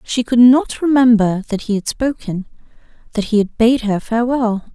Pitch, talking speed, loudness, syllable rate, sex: 230 Hz, 165 wpm, -15 LUFS, 5.0 syllables/s, female